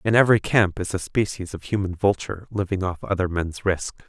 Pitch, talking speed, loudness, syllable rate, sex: 95 Hz, 205 wpm, -23 LUFS, 5.6 syllables/s, male